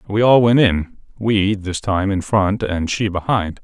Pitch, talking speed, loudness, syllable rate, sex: 100 Hz, 180 wpm, -17 LUFS, 4.1 syllables/s, male